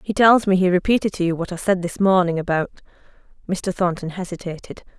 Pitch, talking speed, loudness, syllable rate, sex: 185 Hz, 190 wpm, -20 LUFS, 6.0 syllables/s, female